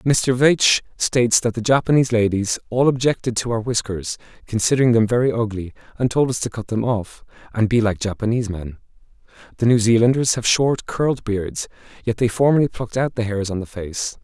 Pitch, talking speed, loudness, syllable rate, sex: 115 Hz, 190 wpm, -19 LUFS, 5.6 syllables/s, male